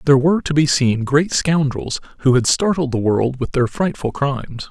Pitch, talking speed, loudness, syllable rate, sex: 140 Hz, 205 wpm, -18 LUFS, 5.1 syllables/s, male